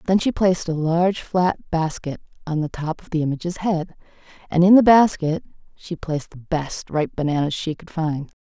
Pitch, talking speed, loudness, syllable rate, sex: 165 Hz, 190 wpm, -21 LUFS, 5.0 syllables/s, female